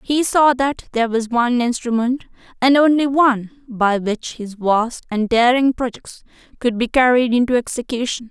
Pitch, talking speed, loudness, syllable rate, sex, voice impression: 245 Hz, 160 wpm, -17 LUFS, 4.9 syllables/s, female, very feminine, very young, very thin, very tensed, powerful, very bright, hard, very clear, fluent, slightly nasal, very cute, very refreshing, slightly sincere, calm, friendly, reassuring, very unique, elegant, very wild, slightly sweet, very lively, very strict, very intense, very sharp